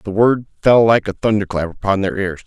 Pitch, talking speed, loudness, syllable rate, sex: 100 Hz, 220 wpm, -16 LUFS, 5.7 syllables/s, male